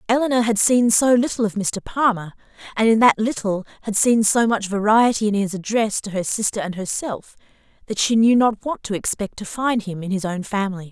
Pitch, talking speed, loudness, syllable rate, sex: 215 Hz, 215 wpm, -20 LUFS, 5.5 syllables/s, female